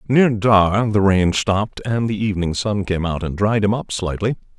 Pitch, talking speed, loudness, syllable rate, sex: 100 Hz, 210 wpm, -18 LUFS, 4.7 syllables/s, male